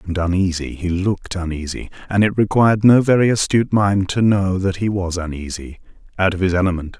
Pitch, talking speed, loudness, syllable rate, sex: 95 Hz, 180 wpm, -18 LUFS, 6.6 syllables/s, male